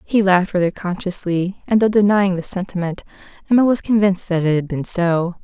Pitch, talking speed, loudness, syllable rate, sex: 190 Hz, 190 wpm, -18 LUFS, 5.7 syllables/s, female